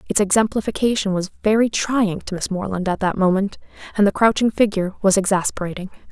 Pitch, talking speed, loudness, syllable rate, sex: 200 Hz, 165 wpm, -19 LUFS, 6.2 syllables/s, female